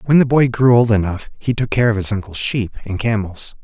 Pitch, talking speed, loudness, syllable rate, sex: 110 Hz, 250 wpm, -17 LUFS, 5.4 syllables/s, male